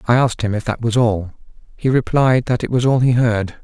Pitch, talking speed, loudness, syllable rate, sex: 120 Hz, 250 wpm, -17 LUFS, 5.6 syllables/s, male